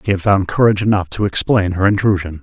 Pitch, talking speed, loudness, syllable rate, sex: 95 Hz, 220 wpm, -15 LUFS, 6.5 syllables/s, male